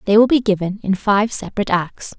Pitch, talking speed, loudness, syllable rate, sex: 205 Hz, 220 wpm, -17 LUFS, 6.0 syllables/s, female